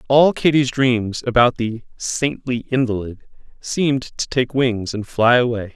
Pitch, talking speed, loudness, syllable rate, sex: 125 Hz, 145 wpm, -19 LUFS, 4.1 syllables/s, male